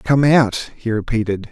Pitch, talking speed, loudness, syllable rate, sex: 120 Hz, 120 wpm, -17 LUFS, 4.2 syllables/s, male